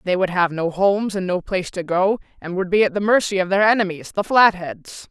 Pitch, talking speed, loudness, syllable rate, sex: 190 Hz, 245 wpm, -19 LUFS, 5.7 syllables/s, female